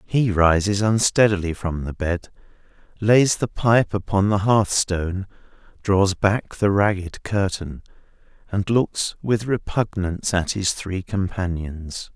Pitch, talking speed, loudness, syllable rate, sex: 100 Hz, 130 wpm, -21 LUFS, 3.9 syllables/s, male